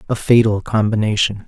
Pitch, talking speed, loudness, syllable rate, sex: 105 Hz, 120 wpm, -16 LUFS, 5.4 syllables/s, male